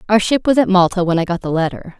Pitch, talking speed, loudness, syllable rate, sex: 190 Hz, 300 wpm, -16 LUFS, 6.7 syllables/s, female